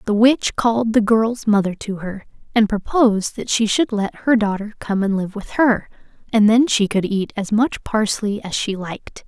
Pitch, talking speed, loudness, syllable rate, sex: 215 Hz, 205 wpm, -18 LUFS, 4.7 syllables/s, female